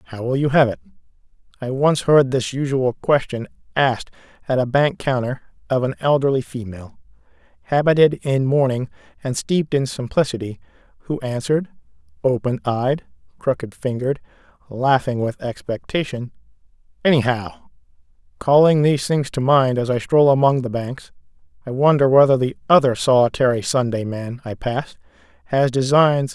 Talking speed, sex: 145 wpm, male